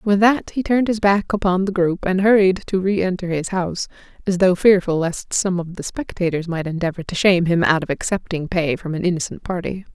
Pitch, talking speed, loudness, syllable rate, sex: 185 Hz, 215 wpm, -19 LUFS, 5.5 syllables/s, female